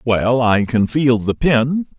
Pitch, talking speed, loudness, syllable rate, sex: 125 Hz, 180 wpm, -16 LUFS, 3.4 syllables/s, male